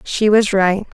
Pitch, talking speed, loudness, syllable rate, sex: 200 Hz, 180 wpm, -15 LUFS, 3.8 syllables/s, female